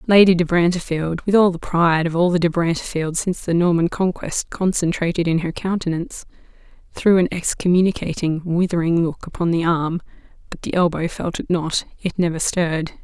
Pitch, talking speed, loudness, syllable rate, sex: 170 Hz, 160 wpm, -19 LUFS, 5.5 syllables/s, female